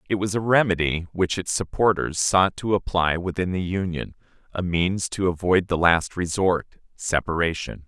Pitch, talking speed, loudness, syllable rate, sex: 90 Hz, 150 wpm, -23 LUFS, 4.8 syllables/s, male